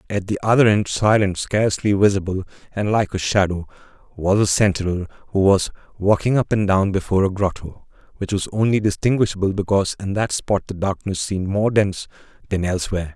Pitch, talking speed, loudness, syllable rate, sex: 100 Hz, 175 wpm, -20 LUFS, 5.9 syllables/s, male